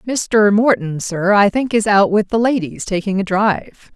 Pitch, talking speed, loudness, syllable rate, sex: 205 Hz, 195 wpm, -16 LUFS, 4.5 syllables/s, female